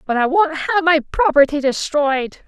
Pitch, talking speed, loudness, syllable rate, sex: 300 Hz, 170 wpm, -16 LUFS, 4.4 syllables/s, female